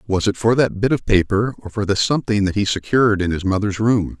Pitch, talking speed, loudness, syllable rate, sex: 105 Hz, 255 wpm, -18 LUFS, 6.0 syllables/s, male